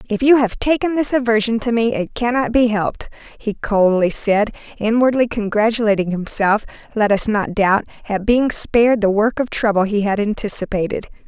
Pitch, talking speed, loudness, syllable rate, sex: 220 Hz, 170 wpm, -17 LUFS, 5.2 syllables/s, female